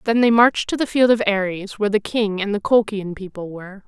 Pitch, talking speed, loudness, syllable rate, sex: 210 Hz, 250 wpm, -18 LUFS, 5.7 syllables/s, female